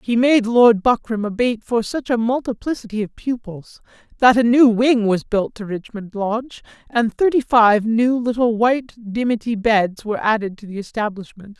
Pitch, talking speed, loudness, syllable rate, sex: 225 Hz, 175 wpm, -18 LUFS, 4.8 syllables/s, male